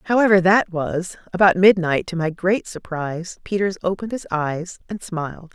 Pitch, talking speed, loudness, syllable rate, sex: 180 Hz, 160 wpm, -20 LUFS, 4.9 syllables/s, female